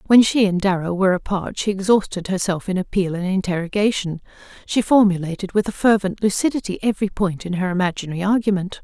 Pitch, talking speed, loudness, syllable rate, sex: 190 Hz, 170 wpm, -20 LUFS, 6.2 syllables/s, female